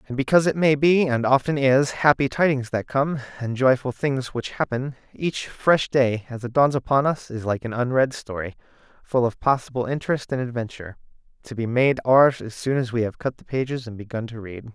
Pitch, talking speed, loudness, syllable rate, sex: 130 Hz, 210 wpm, -22 LUFS, 5.4 syllables/s, male